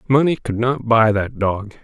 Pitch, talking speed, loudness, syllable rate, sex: 115 Hz, 195 wpm, -18 LUFS, 4.6 syllables/s, male